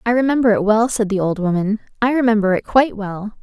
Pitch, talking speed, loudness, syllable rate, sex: 220 Hz, 230 wpm, -17 LUFS, 6.3 syllables/s, female